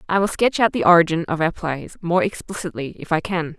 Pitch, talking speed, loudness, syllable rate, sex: 175 Hz, 235 wpm, -20 LUFS, 5.6 syllables/s, female